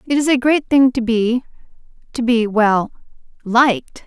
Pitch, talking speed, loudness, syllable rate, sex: 240 Hz, 120 wpm, -16 LUFS, 4.4 syllables/s, female